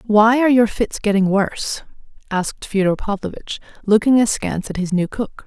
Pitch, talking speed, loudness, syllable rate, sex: 210 Hz, 165 wpm, -18 LUFS, 5.5 syllables/s, female